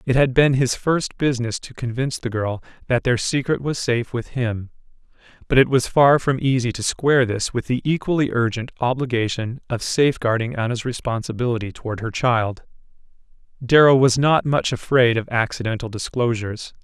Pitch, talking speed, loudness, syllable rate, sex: 125 Hz, 165 wpm, -20 LUFS, 5.4 syllables/s, male